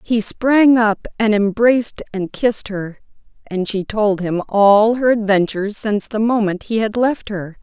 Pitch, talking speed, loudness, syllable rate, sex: 215 Hz, 175 wpm, -17 LUFS, 4.4 syllables/s, female